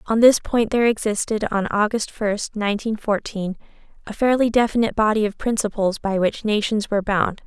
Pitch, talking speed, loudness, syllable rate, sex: 215 Hz, 170 wpm, -20 LUFS, 5.5 syllables/s, female